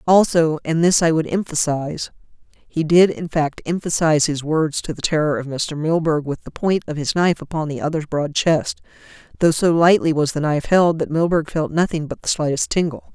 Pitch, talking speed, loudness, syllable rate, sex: 160 Hz, 200 wpm, -19 LUFS, 5.4 syllables/s, female